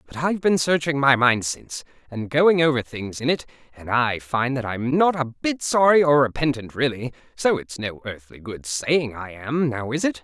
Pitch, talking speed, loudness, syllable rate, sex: 130 Hz, 210 wpm, -21 LUFS, 4.9 syllables/s, male